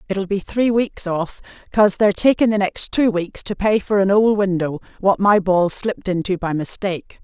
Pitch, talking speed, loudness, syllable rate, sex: 195 Hz, 205 wpm, -18 LUFS, 5.2 syllables/s, female